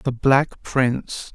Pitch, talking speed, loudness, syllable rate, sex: 130 Hz, 135 wpm, -20 LUFS, 3.1 syllables/s, male